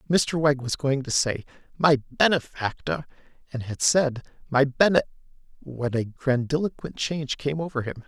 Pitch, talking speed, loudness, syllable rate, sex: 140 Hz, 150 wpm, -24 LUFS, 4.8 syllables/s, male